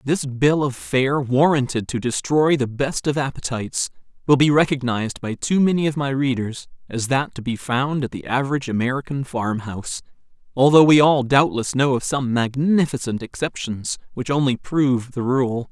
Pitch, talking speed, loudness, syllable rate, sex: 135 Hz, 170 wpm, -20 LUFS, 5.0 syllables/s, male